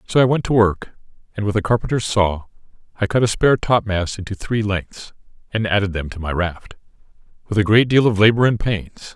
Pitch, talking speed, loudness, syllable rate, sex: 105 Hz, 210 wpm, -18 LUFS, 5.5 syllables/s, male